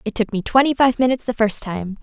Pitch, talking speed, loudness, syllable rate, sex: 225 Hz, 265 wpm, -19 LUFS, 6.3 syllables/s, female